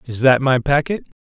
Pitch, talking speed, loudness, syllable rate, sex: 135 Hz, 190 wpm, -17 LUFS, 5.2 syllables/s, male